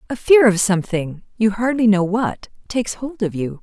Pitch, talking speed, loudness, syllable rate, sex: 215 Hz, 200 wpm, -18 LUFS, 5.1 syllables/s, female